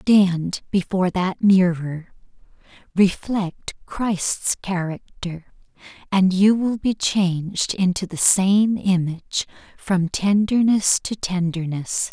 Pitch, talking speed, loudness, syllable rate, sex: 185 Hz, 100 wpm, -20 LUFS, 3.4 syllables/s, female